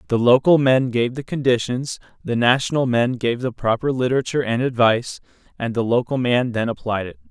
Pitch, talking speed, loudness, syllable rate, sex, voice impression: 125 Hz, 180 wpm, -20 LUFS, 5.6 syllables/s, male, masculine, adult-like, tensed, powerful, clear, fluent, cool, intellectual, wild, lively, slightly light